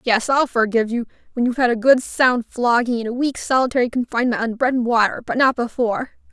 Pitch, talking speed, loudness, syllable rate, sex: 240 Hz, 220 wpm, -19 LUFS, 6.3 syllables/s, female